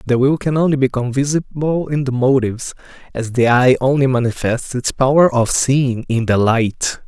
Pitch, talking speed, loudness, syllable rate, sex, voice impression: 130 Hz, 180 wpm, -16 LUFS, 5.0 syllables/s, male, masculine, adult-like, cool, slightly intellectual, slightly calm, slightly elegant